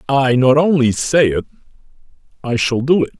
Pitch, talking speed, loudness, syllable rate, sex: 135 Hz, 170 wpm, -15 LUFS, 5.2 syllables/s, male